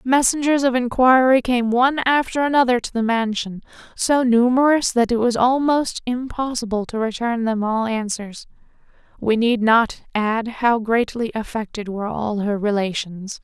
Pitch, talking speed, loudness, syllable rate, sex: 235 Hz, 145 wpm, -19 LUFS, 4.6 syllables/s, female